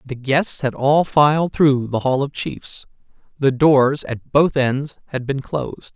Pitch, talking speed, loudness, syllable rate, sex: 140 Hz, 180 wpm, -18 LUFS, 3.8 syllables/s, male